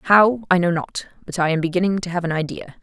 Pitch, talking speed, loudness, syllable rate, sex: 180 Hz, 255 wpm, -20 LUFS, 6.0 syllables/s, female